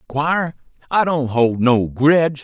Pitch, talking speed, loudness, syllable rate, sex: 140 Hz, 150 wpm, -17 LUFS, 3.8 syllables/s, male